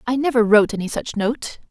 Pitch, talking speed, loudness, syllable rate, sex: 230 Hz, 210 wpm, -19 LUFS, 6.0 syllables/s, female